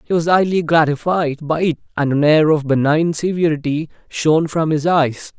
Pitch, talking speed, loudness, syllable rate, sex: 155 Hz, 180 wpm, -16 LUFS, 5.0 syllables/s, male